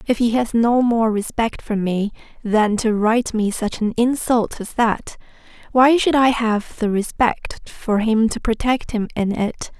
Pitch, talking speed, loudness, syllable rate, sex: 225 Hz, 185 wpm, -19 LUFS, 4.1 syllables/s, female